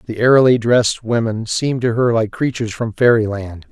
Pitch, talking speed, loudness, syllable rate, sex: 115 Hz, 195 wpm, -16 LUFS, 5.7 syllables/s, male